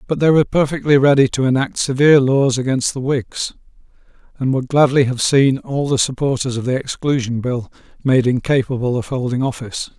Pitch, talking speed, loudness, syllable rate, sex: 130 Hz, 175 wpm, -17 LUFS, 5.5 syllables/s, male